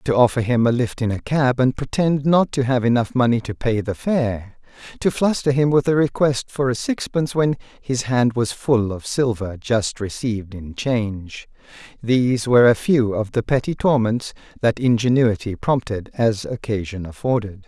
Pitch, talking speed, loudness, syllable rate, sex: 120 Hz, 180 wpm, -20 LUFS, 4.8 syllables/s, male